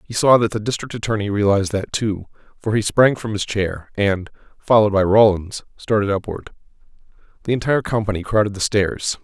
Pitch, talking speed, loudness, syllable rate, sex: 105 Hz, 175 wpm, -19 LUFS, 5.7 syllables/s, male